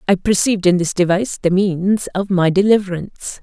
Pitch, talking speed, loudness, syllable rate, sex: 190 Hz, 175 wpm, -16 LUFS, 5.7 syllables/s, female